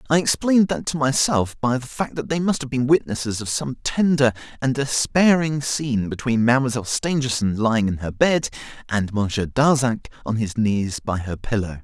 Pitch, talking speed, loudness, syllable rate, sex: 125 Hz, 180 wpm, -21 LUFS, 5.2 syllables/s, male